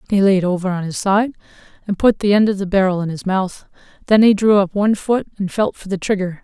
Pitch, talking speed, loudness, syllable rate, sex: 195 Hz, 250 wpm, -17 LUFS, 6.0 syllables/s, female